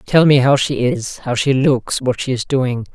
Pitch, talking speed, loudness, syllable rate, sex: 135 Hz, 245 wpm, -16 LUFS, 4.4 syllables/s, female